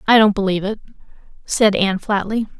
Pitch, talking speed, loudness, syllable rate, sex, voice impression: 205 Hz, 160 wpm, -18 LUFS, 6.6 syllables/s, female, very feminine, young, thin, tensed, powerful, bright, soft, very clear, very fluent, very cute, slightly intellectual, very refreshing, slightly sincere, calm, friendly, reassuring, very unique, elegant, slightly wild, sweet, very lively, strict, intense, sharp, light